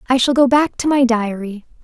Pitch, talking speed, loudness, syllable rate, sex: 250 Hz, 230 wpm, -15 LUFS, 5.4 syllables/s, female